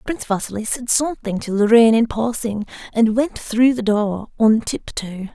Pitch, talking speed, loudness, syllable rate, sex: 225 Hz, 170 wpm, -18 LUFS, 4.8 syllables/s, female